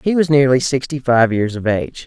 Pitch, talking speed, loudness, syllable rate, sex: 130 Hz, 235 wpm, -16 LUFS, 5.4 syllables/s, male